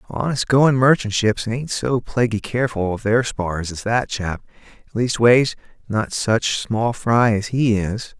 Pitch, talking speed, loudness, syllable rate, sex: 115 Hz, 155 wpm, -19 LUFS, 3.9 syllables/s, male